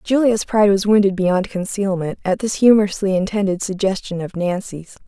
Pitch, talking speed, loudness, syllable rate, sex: 195 Hz, 155 wpm, -18 LUFS, 5.4 syllables/s, female